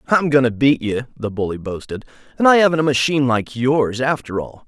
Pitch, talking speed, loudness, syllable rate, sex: 130 Hz, 220 wpm, -18 LUFS, 5.7 syllables/s, male